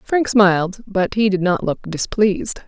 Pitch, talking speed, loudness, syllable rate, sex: 195 Hz, 180 wpm, -18 LUFS, 4.5 syllables/s, female